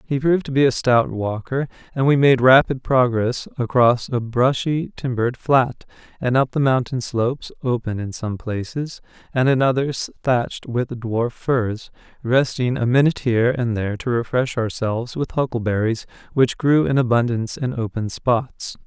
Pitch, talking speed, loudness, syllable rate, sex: 125 Hz, 160 wpm, -20 LUFS, 4.8 syllables/s, male